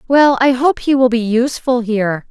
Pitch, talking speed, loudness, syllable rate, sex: 250 Hz, 210 wpm, -14 LUFS, 5.3 syllables/s, female